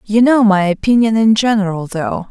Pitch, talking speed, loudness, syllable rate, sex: 210 Hz, 180 wpm, -13 LUFS, 5.0 syllables/s, female